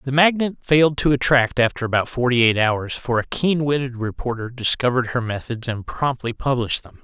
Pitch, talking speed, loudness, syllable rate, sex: 125 Hz, 190 wpm, -20 LUFS, 5.6 syllables/s, male